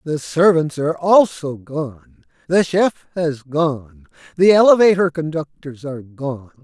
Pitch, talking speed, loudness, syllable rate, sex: 155 Hz, 125 wpm, -17 LUFS, 4.0 syllables/s, male